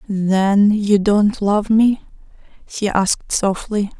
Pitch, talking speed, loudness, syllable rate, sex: 205 Hz, 120 wpm, -17 LUFS, 3.1 syllables/s, female